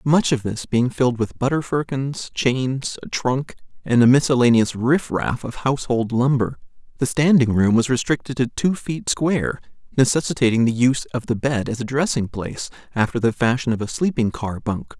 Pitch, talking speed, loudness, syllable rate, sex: 125 Hz, 185 wpm, -20 LUFS, 5.1 syllables/s, male